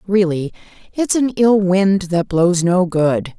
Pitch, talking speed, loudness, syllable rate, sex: 185 Hz, 160 wpm, -16 LUFS, 3.6 syllables/s, female